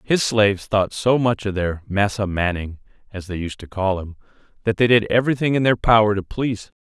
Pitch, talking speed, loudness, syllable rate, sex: 105 Hz, 220 wpm, -20 LUFS, 5.7 syllables/s, male